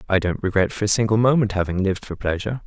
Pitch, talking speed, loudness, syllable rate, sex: 100 Hz, 245 wpm, -21 LUFS, 7.3 syllables/s, male